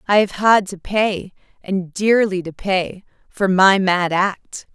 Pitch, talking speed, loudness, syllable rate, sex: 190 Hz, 165 wpm, -18 LUFS, 3.5 syllables/s, female